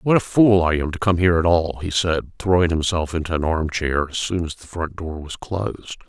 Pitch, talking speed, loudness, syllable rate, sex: 85 Hz, 255 wpm, -20 LUFS, 5.6 syllables/s, male